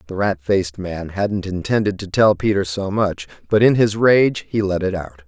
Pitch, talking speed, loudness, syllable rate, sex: 95 Hz, 215 wpm, -18 LUFS, 4.9 syllables/s, male